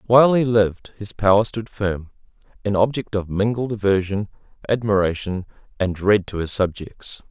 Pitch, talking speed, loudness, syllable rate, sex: 105 Hz, 150 wpm, -21 LUFS, 5.0 syllables/s, male